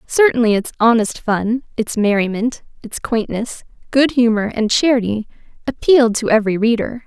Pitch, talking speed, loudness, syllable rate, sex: 230 Hz, 135 wpm, -16 LUFS, 5.1 syllables/s, female